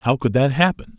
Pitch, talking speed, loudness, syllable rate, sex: 135 Hz, 245 wpm, -18 LUFS, 5.4 syllables/s, male